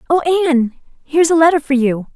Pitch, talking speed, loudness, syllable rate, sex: 295 Hz, 195 wpm, -15 LUFS, 6.3 syllables/s, female